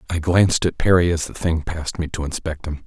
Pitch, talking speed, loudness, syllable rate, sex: 85 Hz, 250 wpm, -21 LUFS, 6.0 syllables/s, male